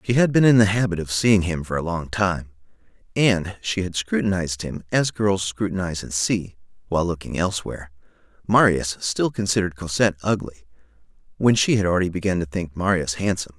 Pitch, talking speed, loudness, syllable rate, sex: 95 Hz, 175 wpm, -22 LUFS, 6.0 syllables/s, male